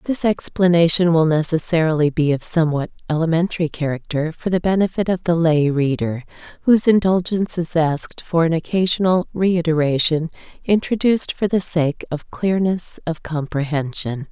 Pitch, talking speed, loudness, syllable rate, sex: 165 Hz, 135 wpm, -19 LUFS, 5.2 syllables/s, female